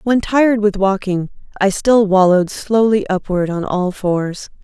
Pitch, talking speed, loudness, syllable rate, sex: 200 Hz, 155 wpm, -16 LUFS, 4.4 syllables/s, female